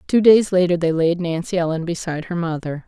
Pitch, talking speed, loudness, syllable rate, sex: 170 Hz, 210 wpm, -19 LUFS, 5.9 syllables/s, female